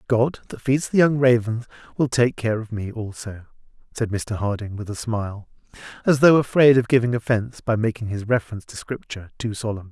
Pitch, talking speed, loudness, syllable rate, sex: 115 Hz, 195 wpm, -21 LUFS, 5.7 syllables/s, male